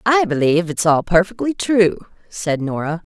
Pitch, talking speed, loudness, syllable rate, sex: 180 Hz, 155 wpm, -17 LUFS, 5.0 syllables/s, female